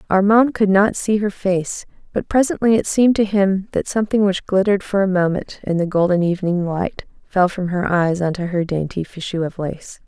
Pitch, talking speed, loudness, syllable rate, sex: 190 Hz, 200 wpm, -18 LUFS, 5.2 syllables/s, female